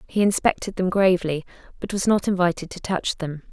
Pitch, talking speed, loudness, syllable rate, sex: 180 Hz, 190 wpm, -22 LUFS, 5.7 syllables/s, female